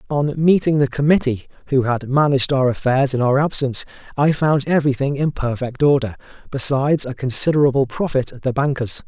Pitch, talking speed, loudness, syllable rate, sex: 135 Hz, 165 wpm, -18 LUFS, 5.8 syllables/s, male